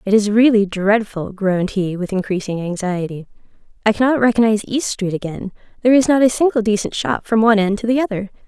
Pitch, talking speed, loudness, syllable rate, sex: 210 Hz, 200 wpm, -17 LUFS, 6.1 syllables/s, female